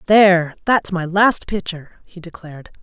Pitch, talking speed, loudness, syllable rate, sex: 180 Hz, 150 wpm, -16 LUFS, 5.2 syllables/s, female